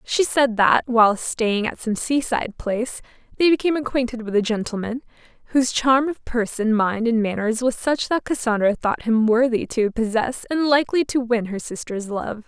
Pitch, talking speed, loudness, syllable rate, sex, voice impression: 240 Hz, 185 wpm, -21 LUFS, 5.1 syllables/s, female, feminine, slightly adult-like, slightly bright, slightly fluent, slightly intellectual, slightly lively